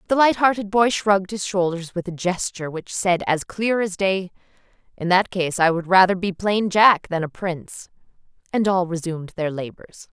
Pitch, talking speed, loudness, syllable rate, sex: 185 Hz, 190 wpm, -21 LUFS, 5.0 syllables/s, female